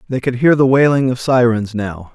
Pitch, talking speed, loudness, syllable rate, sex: 125 Hz, 225 wpm, -14 LUFS, 5.0 syllables/s, male